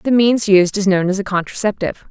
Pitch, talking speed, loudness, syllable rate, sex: 200 Hz, 230 wpm, -16 LUFS, 5.9 syllables/s, female